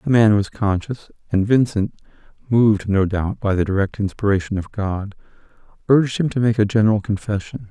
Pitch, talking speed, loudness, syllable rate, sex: 105 Hz, 155 wpm, -19 LUFS, 5.6 syllables/s, male